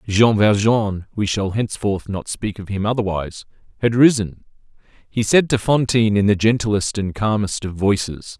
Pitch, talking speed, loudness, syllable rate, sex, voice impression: 105 Hz, 150 wpm, -19 LUFS, 4.8 syllables/s, male, masculine, very adult-like, slightly thick, cool, slightly intellectual, slightly elegant